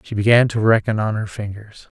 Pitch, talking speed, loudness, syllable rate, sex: 105 Hz, 210 wpm, -18 LUFS, 5.5 syllables/s, male